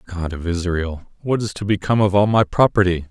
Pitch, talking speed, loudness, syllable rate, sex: 95 Hz, 215 wpm, -19 LUFS, 5.6 syllables/s, male